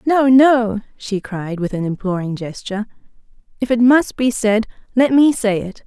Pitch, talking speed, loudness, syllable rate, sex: 225 Hz, 175 wpm, -17 LUFS, 4.6 syllables/s, female